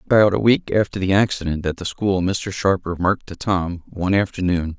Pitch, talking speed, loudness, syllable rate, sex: 95 Hz, 200 wpm, -20 LUFS, 5.5 syllables/s, male